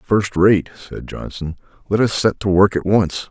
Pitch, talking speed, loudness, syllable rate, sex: 95 Hz, 200 wpm, -17 LUFS, 4.4 syllables/s, male